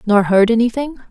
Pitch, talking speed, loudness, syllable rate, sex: 230 Hz, 165 wpm, -15 LUFS, 5.6 syllables/s, female